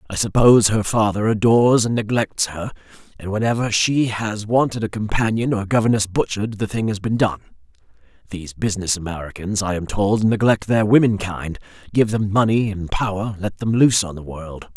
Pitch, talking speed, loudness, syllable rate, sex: 105 Hz, 175 wpm, -19 LUFS, 5.5 syllables/s, male